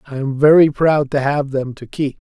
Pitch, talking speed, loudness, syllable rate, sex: 140 Hz, 240 wpm, -16 LUFS, 4.8 syllables/s, male